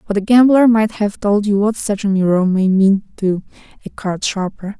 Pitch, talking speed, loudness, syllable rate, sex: 205 Hz, 215 wpm, -15 LUFS, 4.9 syllables/s, female